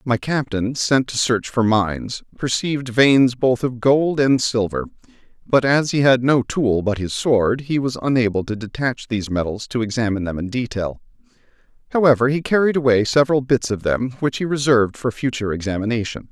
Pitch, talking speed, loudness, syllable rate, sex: 125 Hz, 180 wpm, -19 LUFS, 5.3 syllables/s, male